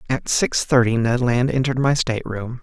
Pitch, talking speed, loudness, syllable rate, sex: 120 Hz, 185 wpm, -19 LUFS, 5.3 syllables/s, male